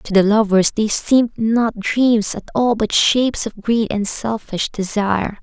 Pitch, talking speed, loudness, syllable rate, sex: 220 Hz, 175 wpm, -17 LUFS, 4.2 syllables/s, female